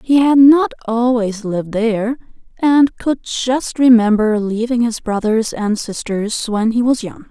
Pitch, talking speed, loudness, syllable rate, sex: 230 Hz, 155 wpm, -15 LUFS, 4.1 syllables/s, female